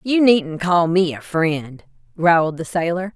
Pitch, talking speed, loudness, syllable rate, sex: 170 Hz, 170 wpm, -18 LUFS, 4.0 syllables/s, female